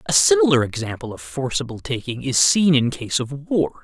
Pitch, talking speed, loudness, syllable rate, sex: 140 Hz, 190 wpm, -19 LUFS, 5.1 syllables/s, male